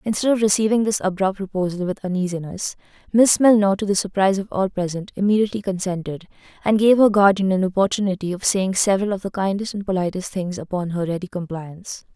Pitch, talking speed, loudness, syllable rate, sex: 195 Hz, 185 wpm, -20 LUFS, 6.2 syllables/s, female